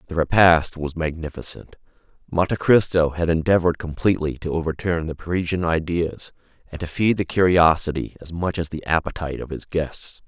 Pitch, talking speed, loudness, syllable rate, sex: 85 Hz, 160 wpm, -21 LUFS, 5.5 syllables/s, male